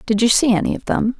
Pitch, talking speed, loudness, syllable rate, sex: 230 Hz, 300 wpm, -17 LUFS, 6.5 syllables/s, female